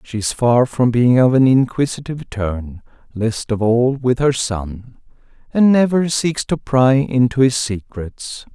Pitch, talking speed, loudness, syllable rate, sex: 125 Hz, 145 wpm, -16 LUFS, 4.0 syllables/s, male